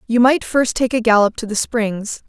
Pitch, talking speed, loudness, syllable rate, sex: 230 Hz, 235 wpm, -17 LUFS, 4.8 syllables/s, female